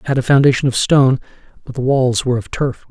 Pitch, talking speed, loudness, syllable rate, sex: 130 Hz, 250 wpm, -15 LUFS, 6.8 syllables/s, male